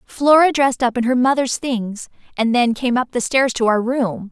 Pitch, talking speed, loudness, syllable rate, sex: 245 Hz, 220 wpm, -17 LUFS, 4.8 syllables/s, female